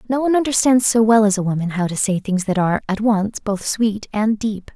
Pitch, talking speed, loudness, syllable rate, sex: 210 Hz, 255 wpm, -18 LUFS, 5.6 syllables/s, female